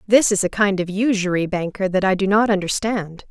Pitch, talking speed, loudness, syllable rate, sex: 195 Hz, 220 wpm, -19 LUFS, 5.4 syllables/s, female